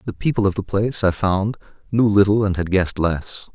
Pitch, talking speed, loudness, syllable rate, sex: 100 Hz, 220 wpm, -19 LUFS, 5.6 syllables/s, male